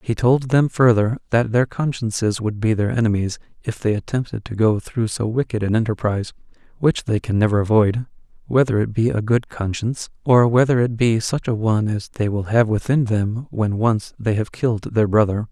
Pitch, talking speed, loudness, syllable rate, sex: 115 Hz, 200 wpm, -20 LUFS, 5.3 syllables/s, male